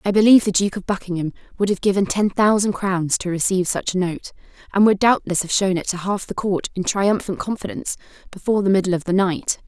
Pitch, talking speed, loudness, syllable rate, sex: 190 Hz, 225 wpm, -20 LUFS, 6.1 syllables/s, female